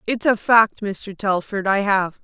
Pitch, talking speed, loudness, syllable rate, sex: 205 Hz, 160 wpm, -19 LUFS, 3.9 syllables/s, female